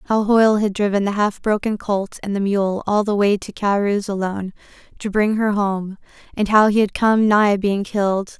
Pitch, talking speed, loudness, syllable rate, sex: 205 Hz, 205 wpm, -19 LUFS, 4.9 syllables/s, female